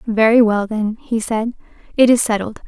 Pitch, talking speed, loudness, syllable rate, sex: 225 Hz, 180 wpm, -16 LUFS, 4.8 syllables/s, female